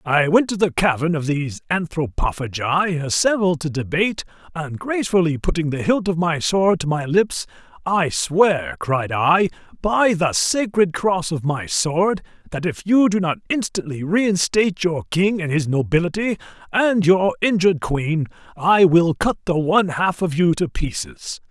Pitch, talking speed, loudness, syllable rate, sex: 170 Hz, 160 wpm, -19 LUFS, 4.5 syllables/s, male